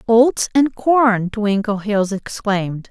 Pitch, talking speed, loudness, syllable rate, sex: 215 Hz, 105 wpm, -17 LUFS, 3.3 syllables/s, female